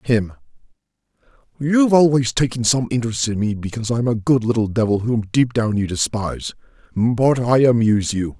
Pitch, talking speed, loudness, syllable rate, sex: 115 Hz, 155 wpm, -18 LUFS, 5.5 syllables/s, male